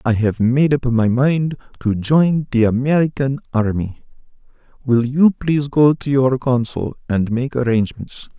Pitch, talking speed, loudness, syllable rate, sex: 130 Hz, 150 wpm, -17 LUFS, 4.4 syllables/s, male